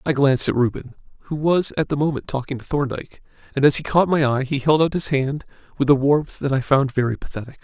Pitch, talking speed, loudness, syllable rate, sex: 140 Hz, 245 wpm, -20 LUFS, 6.2 syllables/s, male